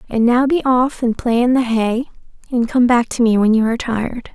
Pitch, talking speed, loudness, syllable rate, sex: 240 Hz, 250 wpm, -16 LUFS, 5.4 syllables/s, female